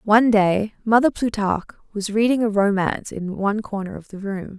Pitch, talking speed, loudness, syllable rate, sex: 205 Hz, 185 wpm, -21 LUFS, 5.6 syllables/s, female